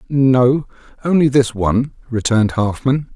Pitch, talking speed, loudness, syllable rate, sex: 125 Hz, 115 wpm, -16 LUFS, 4.5 syllables/s, male